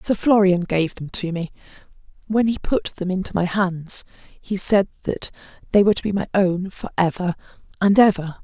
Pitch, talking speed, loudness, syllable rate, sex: 190 Hz, 185 wpm, -20 LUFS, 5.0 syllables/s, female